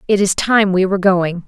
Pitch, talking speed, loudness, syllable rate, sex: 190 Hz, 245 wpm, -15 LUFS, 5.3 syllables/s, female